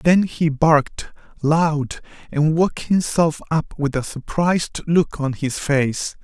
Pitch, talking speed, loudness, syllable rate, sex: 155 Hz, 145 wpm, -20 LUFS, 3.5 syllables/s, male